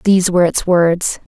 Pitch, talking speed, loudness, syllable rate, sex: 180 Hz, 180 wpm, -14 LUFS, 5.4 syllables/s, female